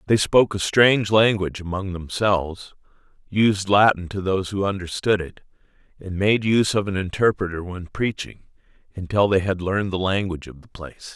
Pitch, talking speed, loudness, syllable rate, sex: 95 Hz, 165 wpm, -21 LUFS, 5.5 syllables/s, male